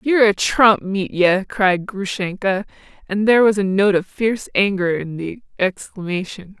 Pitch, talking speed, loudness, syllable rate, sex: 200 Hz, 155 wpm, -18 LUFS, 4.7 syllables/s, female